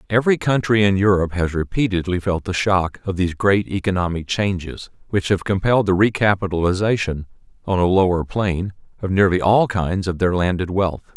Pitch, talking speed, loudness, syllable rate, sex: 95 Hz, 165 wpm, -19 LUFS, 5.6 syllables/s, male